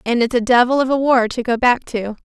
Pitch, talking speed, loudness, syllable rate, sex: 245 Hz, 290 wpm, -16 LUFS, 5.8 syllables/s, female